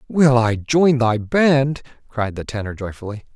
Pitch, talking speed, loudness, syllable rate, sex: 125 Hz, 160 wpm, -18 LUFS, 4.3 syllables/s, male